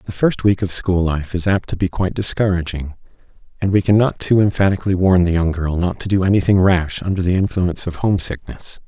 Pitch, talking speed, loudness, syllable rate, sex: 90 Hz, 215 wpm, -17 LUFS, 6.0 syllables/s, male